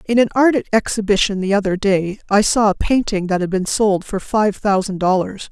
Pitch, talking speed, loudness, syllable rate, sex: 200 Hz, 205 wpm, -17 LUFS, 5.2 syllables/s, female